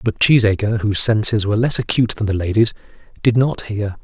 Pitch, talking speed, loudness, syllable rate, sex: 110 Hz, 195 wpm, -17 LUFS, 6.1 syllables/s, male